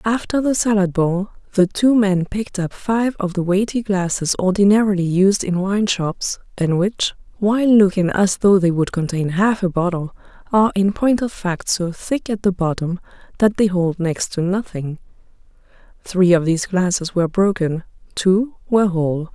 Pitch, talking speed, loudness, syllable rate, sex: 190 Hz, 175 wpm, -18 LUFS, 4.8 syllables/s, female